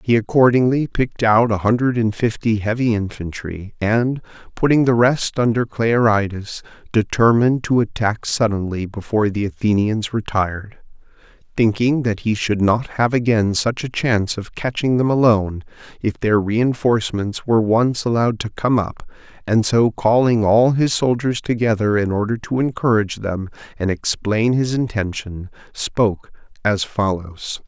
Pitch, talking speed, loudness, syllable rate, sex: 110 Hz, 145 wpm, -18 LUFS, 4.7 syllables/s, male